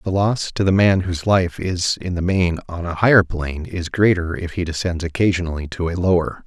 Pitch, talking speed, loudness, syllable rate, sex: 90 Hz, 225 wpm, -19 LUFS, 5.5 syllables/s, male